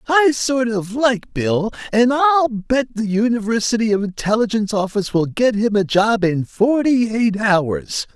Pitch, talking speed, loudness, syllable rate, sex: 220 Hz, 155 wpm, -18 LUFS, 4.4 syllables/s, male